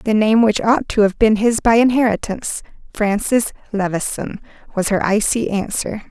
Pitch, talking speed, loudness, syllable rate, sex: 215 Hz, 145 wpm, -17 LUFS, 4.9 syllables/s, female